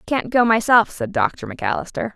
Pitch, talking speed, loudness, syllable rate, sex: 240 Hz, 165 wpm, -19 LUFS, 5.4 syllables/s, female